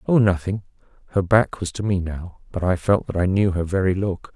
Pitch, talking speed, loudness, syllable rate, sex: 95 Hz, 235 wpm, -22 LUFS, 5.3 syllables/s, male